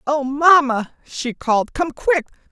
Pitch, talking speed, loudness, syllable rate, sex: 280 Hz, 145 wpm, -18 LUFS, 3.9 syllables/s, female